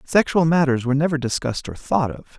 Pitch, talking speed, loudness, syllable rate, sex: 145 Hz, 200 wpm, -20 LUFS, 6.5 syllables/s, male